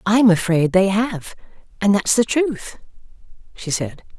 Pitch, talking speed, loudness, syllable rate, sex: 200 Hz, 160 wpm, -18 LUFS, 4.3 syllables/s, female